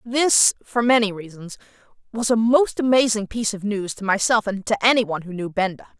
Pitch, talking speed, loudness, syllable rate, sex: 215 Hz, 190 wpm, -20 LUFS, 5.5 syllables/s, female